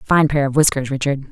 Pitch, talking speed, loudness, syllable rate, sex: 140 Hz, 275 wpm, -17 LUFS, 6.7 syllables/s, female